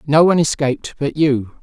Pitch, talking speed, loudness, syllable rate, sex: 145 Hz, 185 wpm, -17 LUFS, 5.7 syllables/s, male